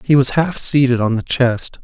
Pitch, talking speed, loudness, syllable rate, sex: 130 Hz, 230 wpm, -15 LUFS, 4.6 syllables/s, male